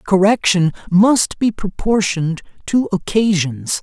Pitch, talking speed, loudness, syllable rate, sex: 190 Hz, 95 wpm, -16 LUFS, 4.1 syllables/s, male